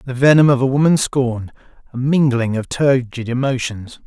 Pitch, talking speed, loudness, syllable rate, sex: 130 Hz, 150 wpm, -16 LUFS, 5.1 syllables/s, male